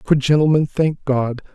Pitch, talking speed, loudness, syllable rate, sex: 140 Hz, 155 wpm, -18 LUFS, 4.5 syllables/s, male